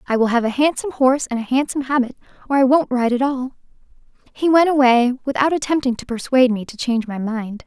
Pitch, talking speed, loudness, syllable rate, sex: 255 Hz, 220 wpm, -18 LUFS, 6.6 syllables/s, female